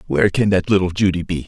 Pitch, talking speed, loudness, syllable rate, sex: 90 Hz, 245 wpm, -17 LUFS, 6.9 syllables/s, male